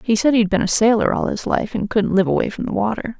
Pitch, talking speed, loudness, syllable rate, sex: 215 Hz, 300 wpm, -18 LUFS, 6.2 syllables/s, female